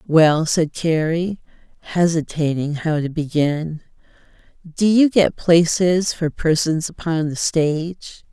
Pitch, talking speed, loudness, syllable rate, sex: 165 Hz, 115 wpm, -19 LUFS, 3.6 syllables/s, female